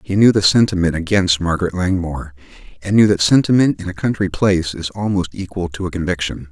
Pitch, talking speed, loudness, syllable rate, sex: 90 Hz, 195 wpm, -17 LUFS, 6.1 syllables/s, male